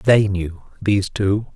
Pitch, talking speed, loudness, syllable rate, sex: 100 Hz, 155 wpm, -20 LUFS, 3.9 syllables/s, male